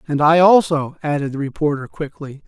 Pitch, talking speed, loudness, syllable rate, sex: 150 Hz, 170 wpm, -17 LUFS, 5.3 syllables/s, male